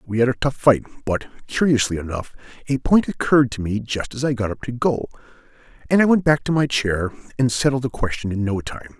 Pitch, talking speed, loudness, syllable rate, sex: 125 Hz, 225 wpm, -21 LUFS, 5.8 syllables/s, male